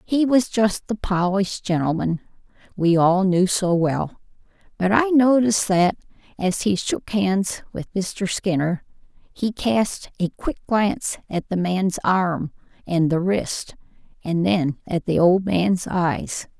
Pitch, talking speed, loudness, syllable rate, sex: 190 Hz, 150 wpm, -21 LUFS, 3.8 syllables/s, female